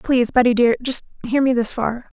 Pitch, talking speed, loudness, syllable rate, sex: 245 Hz, 220 wpm, -19 LUFS, 5.7 syllables/s, female